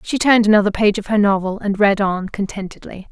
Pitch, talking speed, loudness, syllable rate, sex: 205 Hz, 210 wpm, -16 LUFS, 6.0 syllables/s, female